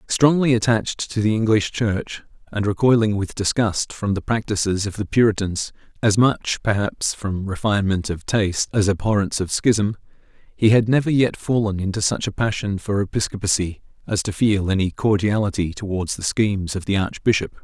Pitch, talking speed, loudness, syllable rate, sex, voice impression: 105 Hz, 160 wpm, -20 LUFS, 5.2 syllables/s, male, masculine, adult-like, tensed, powerful, slightly hard, clear, raspy, cool, intellectual, calm, friendly, reassuring, wild, lively, slightly kind